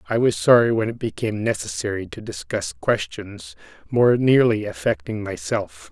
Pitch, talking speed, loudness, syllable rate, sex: 110 Hz, 140 wpm, -21 LUFS, 4.8 syllables/s, male